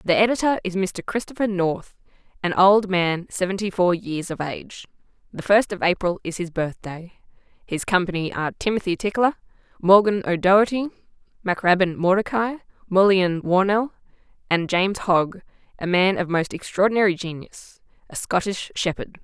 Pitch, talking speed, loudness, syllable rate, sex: 190 Hz, 140 wpm, -21 LUFS, 5.1 syllables/s, female